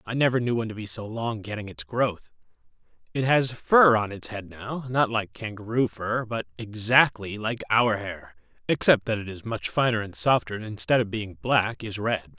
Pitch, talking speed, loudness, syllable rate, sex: 110 Hz, 205 wpm, -25 LUFS, 4.9 syllables/s, male